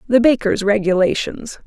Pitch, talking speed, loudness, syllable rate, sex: 220 Hz, 110 wpm, -17 LUFS, 4.7 syllables/s, female